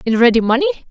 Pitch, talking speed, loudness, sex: 265 Hz, 200 wpm, -14 LUFS, female